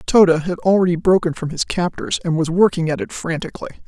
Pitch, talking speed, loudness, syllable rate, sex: 175 Hz, 200 wpm, -18 LUFS, 5.9 syllables/s, female